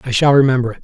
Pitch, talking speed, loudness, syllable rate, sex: 130 Hz, 285 wpm, -13 LUFS, 8.8 syllables/s, male